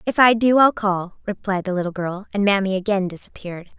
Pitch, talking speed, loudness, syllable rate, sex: 200 Hz, 205 wpm, -20 LUFS, 5.8 syllables/s, female